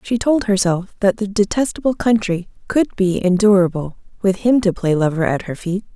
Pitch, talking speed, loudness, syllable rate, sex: 200 Hz, 180 wpm, -18 LUFS, 5.1 syllables/s, female